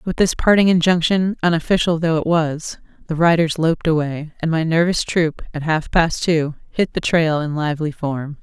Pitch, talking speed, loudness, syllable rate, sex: 160 Hz, 185 wpm, -18 LUFS, 5.0 syllables/s, female